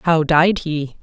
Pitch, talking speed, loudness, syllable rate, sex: 160 Hz, 175 wpm, -17 LUFS, 3.1 syllables/s, female